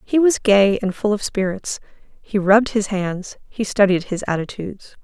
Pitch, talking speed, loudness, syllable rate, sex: 200 Hz, 180 wpm, -19 LUFS, 4.6 syllables/s, female